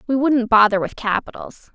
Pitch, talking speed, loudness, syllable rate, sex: 235 Hz, 170 wpm, -17 LUFS, 5.1 syllables/s, female